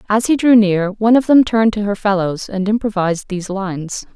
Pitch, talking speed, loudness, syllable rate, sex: 205 Hz, 215 wpm, -15 LUFS, 5.9 syllables/s, female